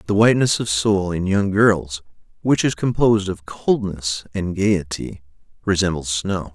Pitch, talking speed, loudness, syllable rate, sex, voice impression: 95 Hz, 145 wpm, -20 LUFS, 4.4 syllables/s, male, very masculine, very adult-like, very middle-aged, slightly relaxed, powerful, slightly bright, slightly soft, slightly muffled, slightly fluent, slightly raspy, cool, very intellectual, slightly refreshing, sincere, very calm, mature, friendly, reassuring, unique, slightly elegant, slightly wild, sweet, lively, kind